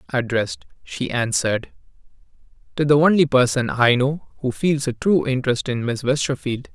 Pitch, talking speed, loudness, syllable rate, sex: 135 Hz, 150 wpm, -20 LUFS, 5.2 syllables/s, male